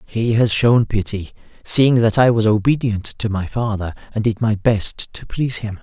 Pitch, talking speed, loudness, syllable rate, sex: 110 Hz, 195 wpm, -18 LUFS, 4.6 syllables/s, male